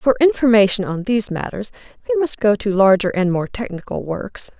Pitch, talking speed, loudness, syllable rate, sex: 220 Hz, 185 wpm, -18 LUFS, 5.4 syllables/s, female